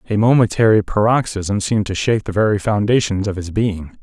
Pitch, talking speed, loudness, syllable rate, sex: 105 Hz, 180 wpm, -17 LUFS, 5.8 syllables/s, male